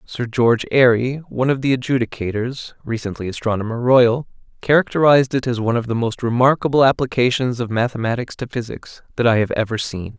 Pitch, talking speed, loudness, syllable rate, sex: 120 Hz, 165 wpm, -18 LUFS, 5.4 syllables/s, male